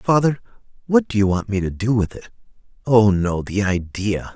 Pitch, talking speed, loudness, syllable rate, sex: 105 Hz, 195 wpm, -19 LUFS, 4.8 syllables/s, male